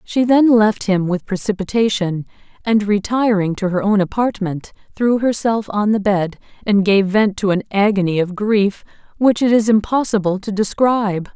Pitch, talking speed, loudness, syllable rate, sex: 205 Hz, 165 wpm, -17 LUFS, 4.7 syllables/s, female